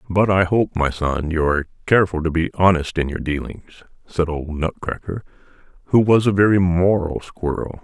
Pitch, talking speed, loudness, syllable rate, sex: 85 Hz, 175 wpm, -19 LUFS, 5.1 syllables/s, male